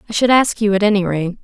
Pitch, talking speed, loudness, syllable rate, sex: 205 Hz, 290 wpm, -15 LUFS, 6.6 syllables/s, female